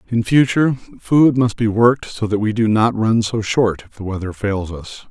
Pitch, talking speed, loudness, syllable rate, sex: 110 Hz, 225 wpm, -17 LUFS, 5.0 syllables/s, male